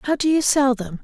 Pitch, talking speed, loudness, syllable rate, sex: 265 Hz, 290 wpm, -19 LUFS, 5.1 syllables/s, female